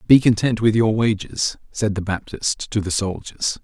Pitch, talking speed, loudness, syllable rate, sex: 105 Hz, 180 wpm, -20 LUFS, 4.5 syllables/s, male